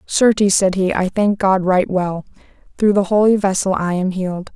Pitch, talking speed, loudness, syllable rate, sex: 190 Hz, 200 wpm, -16 LUFS, 4.9 syllables/s, female